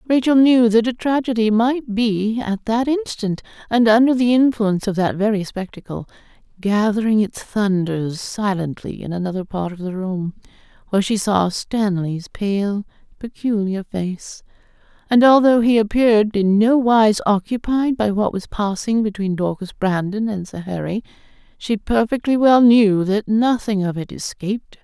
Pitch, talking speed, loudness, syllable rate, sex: 215 Hz, 145 wpm, -18 LUFS, 4.6 syllables/s, female